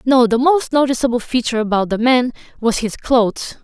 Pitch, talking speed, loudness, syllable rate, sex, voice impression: 245 Hz, 180 wpm, -16 LUFS, 5.6 syllables/s, female, feminine, slightly young, fluent, slightly cute, slightly friendly, lively